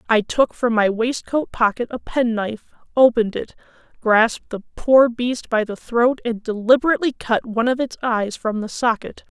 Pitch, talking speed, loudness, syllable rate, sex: 235 Hz, 170 wpm, -19 LUFS, 5.0 syllables/s, female